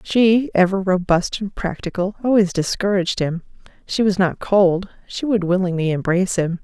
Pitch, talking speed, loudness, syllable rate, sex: 190 Hz, 155 wpm, -19 LUFS, 5.0 syllables/s, female